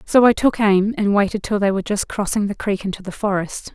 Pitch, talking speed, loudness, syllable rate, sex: 205 Hz, 255 wpm, -19 LUFS, 5.8 syllables/s, female